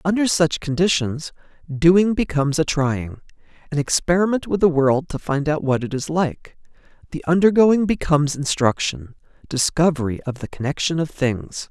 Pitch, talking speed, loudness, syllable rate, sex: 155 Hz, 145 wpm, -20 LUFS, 4.9 syllables/s, male